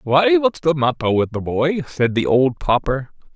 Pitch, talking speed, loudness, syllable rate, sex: 140 Hz, 195 wpm, -18 LUFS, 4.6 syllables/s, male